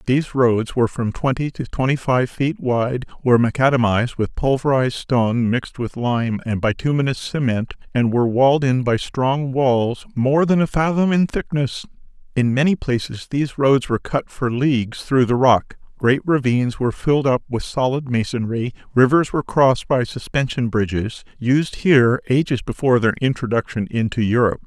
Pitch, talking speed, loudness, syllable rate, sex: 130 Hz, 165 wpm, -19 LUFS, 5.2 syllables/s, male